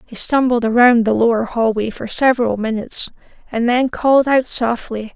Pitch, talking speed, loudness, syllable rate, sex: 235 Hz, 165 wpm, -16 LUFS, 5.2 syllables/s, female